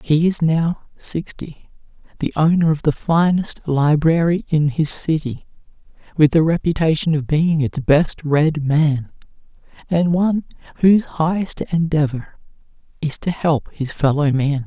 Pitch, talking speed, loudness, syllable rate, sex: 155 Hz, 135 wpm, -18 LUFS, 4.2 syllables/s, male